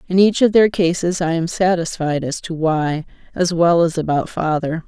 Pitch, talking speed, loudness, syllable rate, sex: 170 Hz, 195 wpm, -18 LUFS, 4.7 syllables/s, female